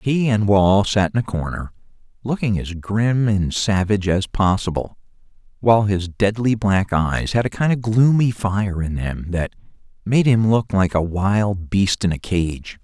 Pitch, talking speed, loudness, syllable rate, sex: 100 Hz, 180 wpm, -19 LUFS, 4.2 syllables/s, male